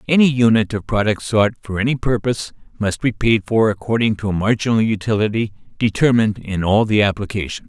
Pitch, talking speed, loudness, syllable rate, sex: 110 Hz, 170 wpm, -18 LUFS, 5.9 syllables/s, male